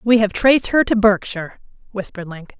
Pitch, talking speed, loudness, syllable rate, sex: 210 Hz, 185 wpm, -16 LUFS, 5.8 syllables/s, female